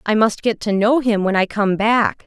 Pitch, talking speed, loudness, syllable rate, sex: 215 Hz, 265 wpm, -17 LUFS, 4.6 syllables/s, female